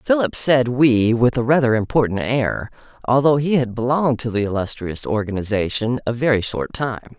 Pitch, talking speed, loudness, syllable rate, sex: 125 Hz, 165 wpm, -19 LUFS, 5.0 syllables/s, female